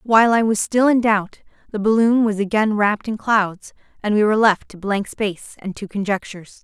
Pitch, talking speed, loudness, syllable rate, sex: 210 Hz, 210 wpm, -18 LUFS, 5.5 syllables/s, female